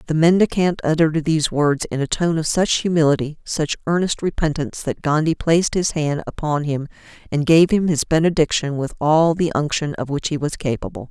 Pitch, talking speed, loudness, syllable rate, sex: 155 Hz, 190 wpm, -19 LUFS, 5.5 syllables/s, female